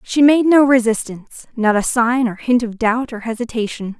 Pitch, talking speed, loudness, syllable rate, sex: 235 Hz, 195 wpm, -16 LUFS, 5.0 syllables/s, female